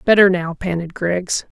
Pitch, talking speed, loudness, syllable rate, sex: 180 Hz, 150 wpm, -18 LUFS, 4.3 syllables/s, female